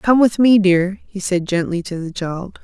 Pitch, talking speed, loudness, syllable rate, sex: 190 Hz, 230 wpm, -17 LUFS, 4.3 syllables/s, female